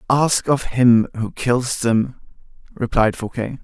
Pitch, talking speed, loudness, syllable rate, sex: 120 Hz, 130 wpm, -19 LUFS, 3.6 syllables/s, male